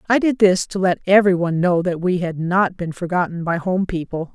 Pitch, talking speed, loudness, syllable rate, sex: 180 Hz, 220 wpm, -19 LUFS, 5.4 syllables/s, female